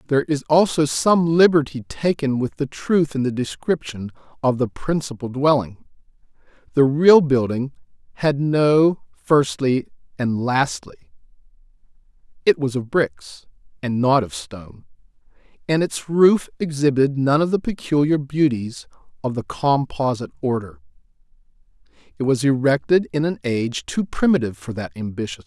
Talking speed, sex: 140 wpm, male